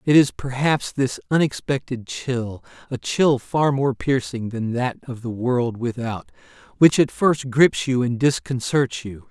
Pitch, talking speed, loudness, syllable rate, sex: 130 Hz, 160 wpm, -21 LUFS, 4.0 syllables/s, male